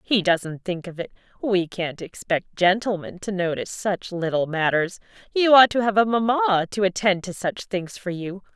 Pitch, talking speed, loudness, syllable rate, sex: 190 Hz, 190 wpm, -22 LUFS, 4.7 syllables/s, female